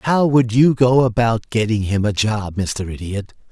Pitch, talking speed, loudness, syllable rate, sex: 115 Hz, 190 wpm, -18 LUFS, 4.3 syllables/s, male